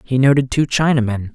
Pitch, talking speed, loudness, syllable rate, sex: 130 Hz, 180 wpm, -16 LUFS, 5.6 syllables/s, male